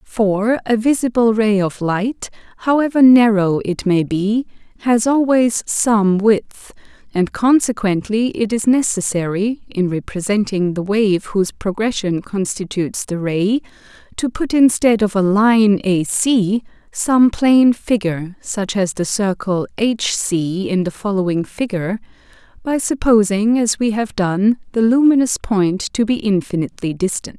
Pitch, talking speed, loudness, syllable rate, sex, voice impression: 210 Hz, 140 wpm, -17 LUFS, 4.2 syllables/s, female, very feminine, very adult-like, very middle-aged, very thin, tensed, slightly powerful, bright, soft, very clear, fluent, slightly raspy, cool, very intellectual, refreshing, very sincere, very calm, slightly mature, very friendly, very reassuring, slightly unique, very elegant, sweet, slightly lively, very kind, modest